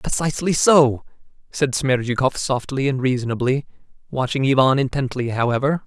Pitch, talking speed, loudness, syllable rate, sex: 135 Hz, 115 wpm, -20 LUFS, 5.3 syllables/s, male